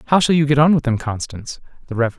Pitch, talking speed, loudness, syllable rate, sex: 135 Hz, 275 wpm, -17 LUFS, 7.1 syllables/s, male